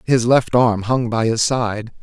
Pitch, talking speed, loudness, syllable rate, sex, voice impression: 115 Hz, 205 wpm, -17 LUFS, 3.8 syllables/s, male, masculine, adult-like, slightly fluent, slightly cool, slightly refreshing, sincere, friendly